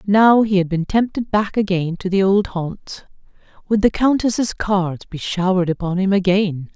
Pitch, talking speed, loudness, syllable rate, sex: 195 Hz, 180 wpm, -18 LUFS, 4.7 syllables/s, female